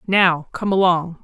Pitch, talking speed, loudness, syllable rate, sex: 180 Hz, 145 wpm, -18 LUFS, 3.9 syllables/s, female